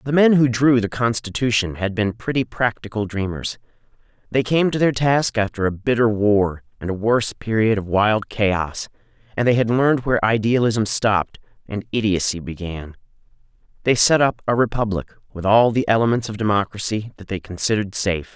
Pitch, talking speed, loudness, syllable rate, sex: 110 Hz, 170 wpm, -20 LUFS, 5.3 syllables/s, male